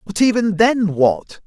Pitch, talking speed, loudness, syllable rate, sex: 200 Hz, 165 wpm, -16 LUFS, 3.9 syllables/s, male